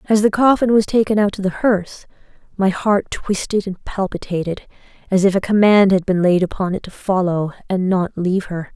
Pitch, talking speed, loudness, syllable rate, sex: 195 Hz, 200 wpm, -17 LUFS, 5.3 syllables/s, female